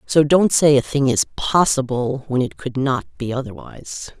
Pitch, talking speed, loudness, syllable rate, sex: 135 Hz, 185 wpm, -18 LUFS, 4.6 syllables/s, female